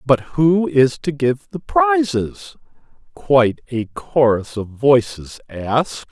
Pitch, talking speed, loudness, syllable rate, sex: 140 Hz, 130 wpm, -17 LUFS, 3.4 syllables/s, male